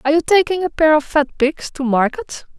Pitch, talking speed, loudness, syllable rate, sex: 305 Hz, 230 wpm, -16 LUFS, 5.4 syllables/s, female